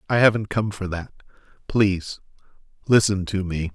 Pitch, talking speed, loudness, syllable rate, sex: 95 Hz, 145 wpm, -22 LUFS, 5.1 syllables/s, male